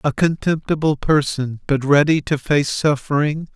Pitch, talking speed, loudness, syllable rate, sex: 145 Hz, 135 wpm, -18 LUFS, 4.5 syllables/s, male